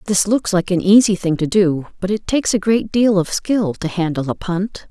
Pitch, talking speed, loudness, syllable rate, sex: 195 Hz, 245 wpm, -17 LUFS, 5.0 syllables/s, female